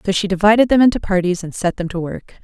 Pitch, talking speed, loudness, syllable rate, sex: 190 Hz, 270 wpm, -16 LUFS, 6.7 syllables/s, female